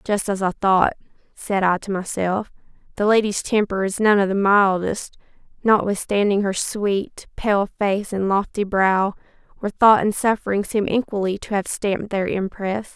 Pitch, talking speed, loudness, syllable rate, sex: 200 Hz, 160 wpm, -20 LUFS, 4.6 syllables/s, female